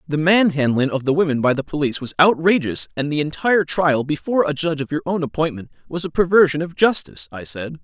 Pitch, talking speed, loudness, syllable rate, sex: 155 Hz, 215 wpm, -19 LUFS, 5.3 syllables/s, male